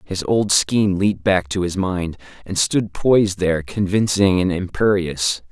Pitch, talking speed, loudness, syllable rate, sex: 95 Hz, 165 wpm, -19 LUFS, 4.5 syllables/s, male